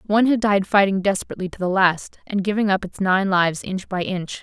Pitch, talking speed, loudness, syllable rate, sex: 195 Hz, 230 wpm, -20 LUFS, 5.8 syllables/s, female